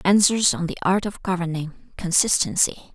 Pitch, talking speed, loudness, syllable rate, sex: 180 Hz, 120 wpm, -21 LUFS, 5.1 syllables/s, female